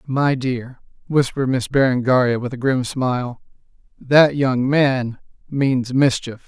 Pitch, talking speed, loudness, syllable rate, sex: 130 Hz, 130 wpm, -19 LUFS, 4.0 syllables/s, male